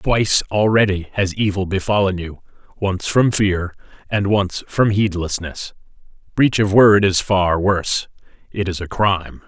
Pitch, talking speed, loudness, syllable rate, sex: 95 Hz, 140 wpm, -18 LUFS, 4.4 syllables/s, male